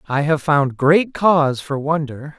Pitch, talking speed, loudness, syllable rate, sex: 150 Hz, 175 wpm, -17 LUFS, 4.1 syllables/s, male